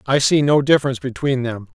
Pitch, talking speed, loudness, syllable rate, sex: 130 Hz, 200 wpm, -18 LUFS, 6.3 syllables/s, male